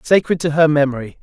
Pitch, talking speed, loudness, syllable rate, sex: 150 Hz, 195 wpm, -16 LUFS, 6.3 syllables/s, male